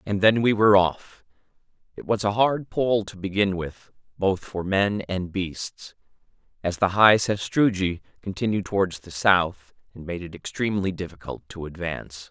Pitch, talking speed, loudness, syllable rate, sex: 95 Hz, 160 wpm, -23 LUFS, 4.7 syllables/s, male